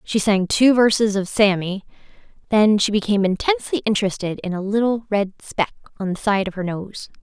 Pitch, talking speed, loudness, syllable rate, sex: 205 Hz, 185 wpm, -20 LUFS, 5.5 syllables/s, female